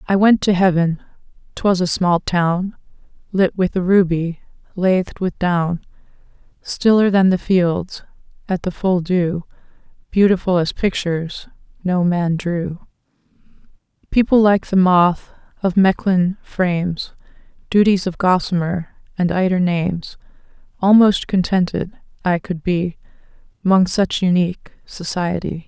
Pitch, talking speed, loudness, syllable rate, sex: 180 Hz, 120 wpm, -18 LUFS, 4.1 syllables/s, female